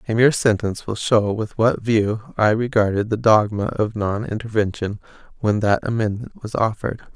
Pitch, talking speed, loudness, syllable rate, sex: 110 Hz, 170 wpm, -20 LUFS, 5.2 syllables/s, male